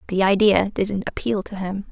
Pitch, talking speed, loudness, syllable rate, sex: 195 Hz, 190 wpm, -21 LUFS, 4.7 syllables/s, female